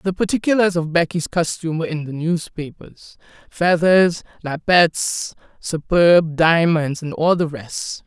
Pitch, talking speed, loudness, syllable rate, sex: 165 Hz, 120 wpm, -18 LUFS, 4.2 syllables/s, female